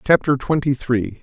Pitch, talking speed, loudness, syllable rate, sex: 130 Hz, 145 wpm, -19 LUFS, 4.4 syllables/s, male